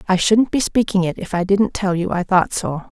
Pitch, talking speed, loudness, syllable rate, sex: 190 Hz, 260 wpm, -18 LUFS, 5.2 syllables/s, female